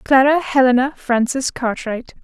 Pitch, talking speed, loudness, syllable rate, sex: 260 Hz, 110 wpm, -17 LUFS, 4.4 syllables/s, female